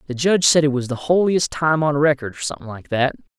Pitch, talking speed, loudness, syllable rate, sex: 145 Hz, 250 wpm, -19 LUFS, 6.3 syllables/s, male